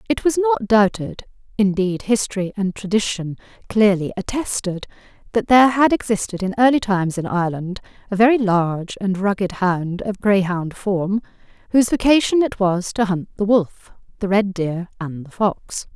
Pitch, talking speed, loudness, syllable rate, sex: 200 Hz, 150 wpm, -19 LUFS, 4.9 syllables/s, female